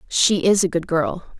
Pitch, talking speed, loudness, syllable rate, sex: 180 Hz, 215 wpm, -19 LUFS, 4.3 syllables/s, female